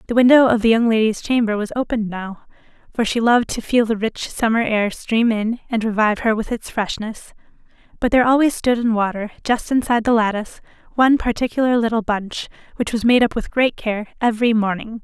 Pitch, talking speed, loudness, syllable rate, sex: 225 Hz, 200 wpm, -18 LUFS, 5.9 syllables/s, female